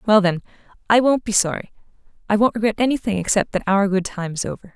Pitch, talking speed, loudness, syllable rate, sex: 205 Hz, 200 wpm, -19 LUFS, 6.5 syllables/s, female